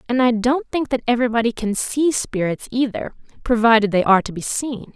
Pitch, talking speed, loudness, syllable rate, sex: 240 Hz, 195 wpm, -19 LUFS, 5.7 syllables/s, female